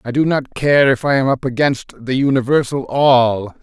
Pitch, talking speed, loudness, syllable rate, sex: 130 Hz, 200 wpm, -16 LUFS, 4.6 syllables/s, male